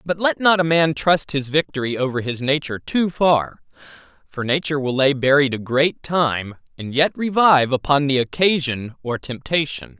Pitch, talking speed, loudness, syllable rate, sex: 145 Hz, 175 wpm, -19 LUFS, 4.9 syllables/s, male